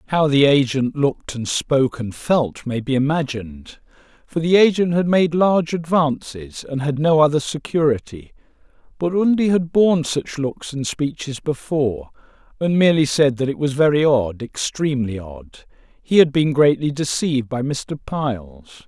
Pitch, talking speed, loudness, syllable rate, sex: 145 Hz, 155 wpm, -19 LUFS, 4.8 syllables/s, male